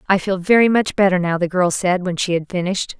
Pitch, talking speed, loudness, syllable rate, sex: 185 Hz, 260 wpm, -17 LUFS, 6.1 syllables/s, female